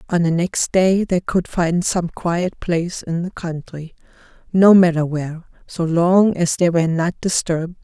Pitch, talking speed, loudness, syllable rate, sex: 175 Hz, 170 wpm, -18 LUFS, 4.4 syllables/s, female